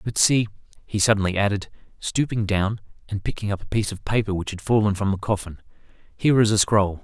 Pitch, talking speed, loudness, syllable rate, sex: 105 Hz, 205 wpm, -23 LUFS, 6.2 syllables/s, male